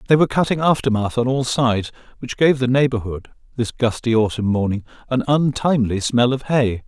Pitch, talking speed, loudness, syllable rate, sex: 125 Hz, 175 wpm, -19 LUFS, 5.6 syllables/s, male